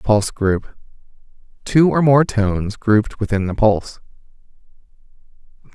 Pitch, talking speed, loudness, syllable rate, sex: 110 Hz, 105 wpm, -17 LUFS, 4.8 syllables/s, male